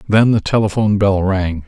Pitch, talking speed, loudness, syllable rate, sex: 100 Hz, 180 wpm, -15 LUFS, 5.3 syllables/s, male